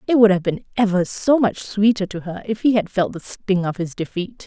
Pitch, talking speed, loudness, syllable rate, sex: 200 Hz, 255 wpm, -20 LUFS, 5.3 syllables/s, female